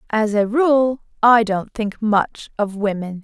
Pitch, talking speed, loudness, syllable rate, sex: 220 Hz, 165 wpm, -18 LUFS, 3.6 syllables/s, female